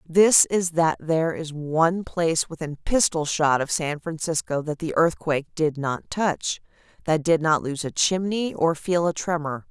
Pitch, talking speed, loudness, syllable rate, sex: 160 Hz, 180 wpm, -23 LUFS, 4.5 syllables/s, female